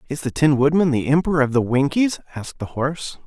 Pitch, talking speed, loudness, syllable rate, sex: 145 Hz, 220 wpm, -19 LUFS, 6.3 syllables/s, male